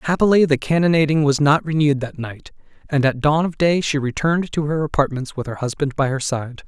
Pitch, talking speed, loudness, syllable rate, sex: 145 Hz, 215 wpm, -19 LUFS, 5.9 syllables/s, male